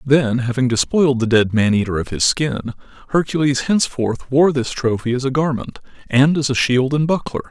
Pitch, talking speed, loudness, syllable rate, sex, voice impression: 130 Hz, 190 wpm, -17 LUFS, 5.4 syllables/s, male, masculine, slightly old, thick, tensed, hard, slightly muffled, slightly raspy, intellectual, calm, mature, reassuring, wild, lively, slightly strict